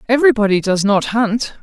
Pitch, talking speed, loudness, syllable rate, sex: 220 Hz, 185 wpm, -15 LUFS, 5.8 syllables/s, female